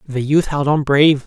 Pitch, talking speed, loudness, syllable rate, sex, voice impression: 145 Hz, 235 wpm, -15 LUFS, 6.0 syllables/s, male, masculine, adult-like, weak, slightly bright, fluent, slightly intellectual, slightly friendly, unique, modest